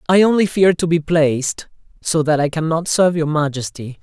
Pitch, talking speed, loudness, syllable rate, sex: 160 Hz, 195 wpm, -17 LUFS, 5.4 syllables/s, male